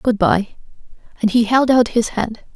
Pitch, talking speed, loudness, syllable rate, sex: 230 Hz, 190 wpm, -17 LUFS, 4.4 syllables/s, female